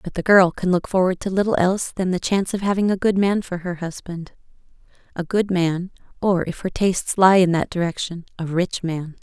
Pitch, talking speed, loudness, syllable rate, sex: 180 Hz, 215 wpm, -20 LUFS, 5.6 syllables/s, female